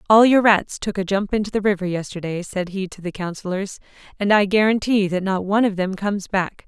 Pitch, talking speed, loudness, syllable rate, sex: 195 Hz, 225 wpm, -20 LUFS, 5.8 syllables/s, female